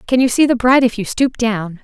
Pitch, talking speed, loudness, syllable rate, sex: 235 Hz, 295 wpm, -15 LUFS, 5.9 syllables/s, female